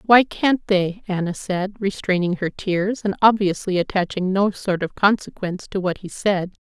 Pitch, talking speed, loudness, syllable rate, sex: 190 Hz, 170 wpm, -21 LUFS, 4.7 syllables/s, female